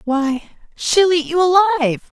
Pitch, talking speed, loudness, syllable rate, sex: 310 Hz, 110 wpm, -16 LUFS, 4.6 syllables/s, female